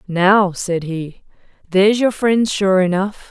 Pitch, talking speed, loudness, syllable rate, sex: 195 Hz, 145 wpm, -16 LUFS, 3.7 syllables/s, female